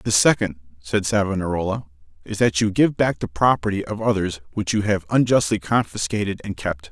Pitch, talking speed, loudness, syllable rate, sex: 100 Hz, 175 wpm, -21 LUFS, 5.5 syllables/s, male